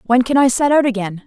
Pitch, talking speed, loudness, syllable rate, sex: 245 Hz, 285 wpm, -15 LUFS, 6.3 syllables/s, female